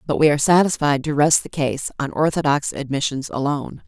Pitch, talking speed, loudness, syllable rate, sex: 145 Hz, 185 wpm, -19 LUFS, 5.7 syllables/s, female